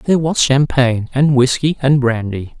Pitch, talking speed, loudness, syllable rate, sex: 135 Hz, 160 wpm, -15 LUFS, 4.8 syllables/s, male